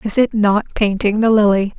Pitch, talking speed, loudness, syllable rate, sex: 210 Hz, 200 wpm, -15 LUFS, 4.5 syllables/s, female